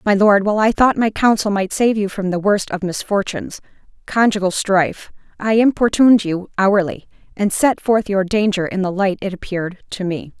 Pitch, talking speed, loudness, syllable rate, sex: 200 Hz, 190 wpm, -17 LUFS, 5.3 syllables/s, female